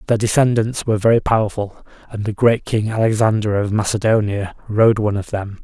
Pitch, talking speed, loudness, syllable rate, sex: 110 Hz, 170 wpm, -18 LUFS, 5.7 syllables/s, male